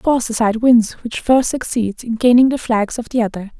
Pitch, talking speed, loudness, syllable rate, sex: 235 Hz, 250 wpm, -16 LUFS, 5.4 syllables/s, female